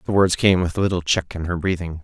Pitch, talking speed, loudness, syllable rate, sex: 90 Hz, 295 wpm, -20 LUFS, 6.4 syllables/s, male